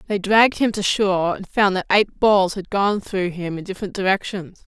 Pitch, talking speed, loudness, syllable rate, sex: 195 Hz, 215 wpm, -19 LUFS, 5.2 syllables/s, female